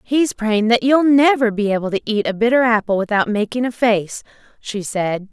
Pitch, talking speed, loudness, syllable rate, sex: 225 Hz, 205 wpm, -17 LUFS, 5.0 syllables/s, female